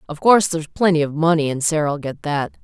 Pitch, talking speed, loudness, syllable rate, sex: 160 Hz, 225 wpm, -18 LUFS, 6.3 syllables/s, female